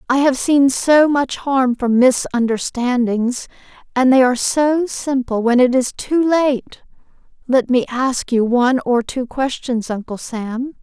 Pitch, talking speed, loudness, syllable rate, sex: 255 Hz, 150 wpm, -17 LUFS, 3.9 syllables/s, female